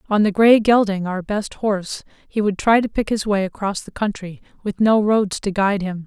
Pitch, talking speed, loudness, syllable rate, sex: 205 Hz, 225 wpm, -19 LUFS, 5.1 syllables/s, female